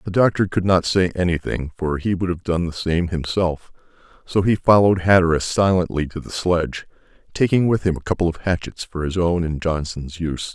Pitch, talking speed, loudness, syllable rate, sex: 85 Hz, 200 wpm, -20 LUFS, 5.5 syllables/s, male